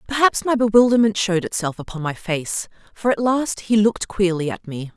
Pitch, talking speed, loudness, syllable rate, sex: 205 Hz, 195 wpm, -20 LUFS, 5.5 syllables/s, female